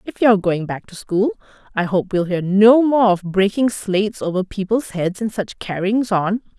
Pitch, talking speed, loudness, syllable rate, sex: 200 Hz, 200 wpm, -18 LUFS, 4.8 syllables/s, female